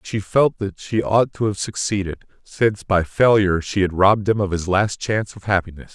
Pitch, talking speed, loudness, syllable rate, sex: 100 Hz, 220 wpm, -19 LUFS, 5.5 syllables/s, male